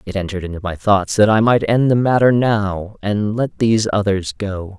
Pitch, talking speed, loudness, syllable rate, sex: 105 Hz, 215 wpm, -17 LUFS, 5.1 syllables/s, male